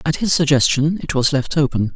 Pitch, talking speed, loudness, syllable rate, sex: 145 Hz, 215 wpm, -17 LUFS, 5.4 syllables/s, male